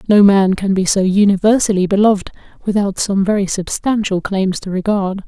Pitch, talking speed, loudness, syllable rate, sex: 195 Hz, 160 wpm, -15 LUFS, 5.3 syllables/s, female